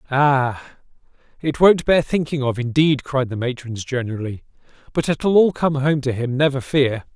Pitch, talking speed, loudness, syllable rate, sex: 135 Hz, 170 wpm, -19 LUFS, 4.7 syllables/s, male